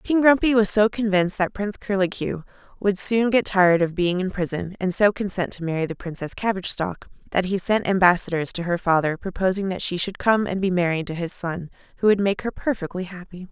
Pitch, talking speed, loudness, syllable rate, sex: 190 Hz, 220 wpm, -22 LUFS, 5.8 syllables/s, female